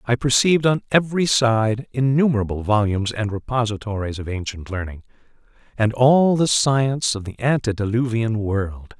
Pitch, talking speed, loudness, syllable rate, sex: 115 Hz, 135 wpm, -20 LUFS, 5.1 syllables/s, male